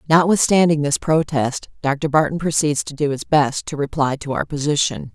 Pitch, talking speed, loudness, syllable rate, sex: 150 Hz, 175 wpm, -19 LUFS, 5.0 syllables/s, female